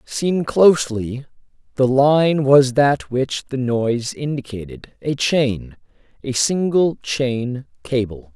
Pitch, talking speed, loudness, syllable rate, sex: 130 Hz, 110 wpm, -18 LUFS, 3.4 syllables/s, male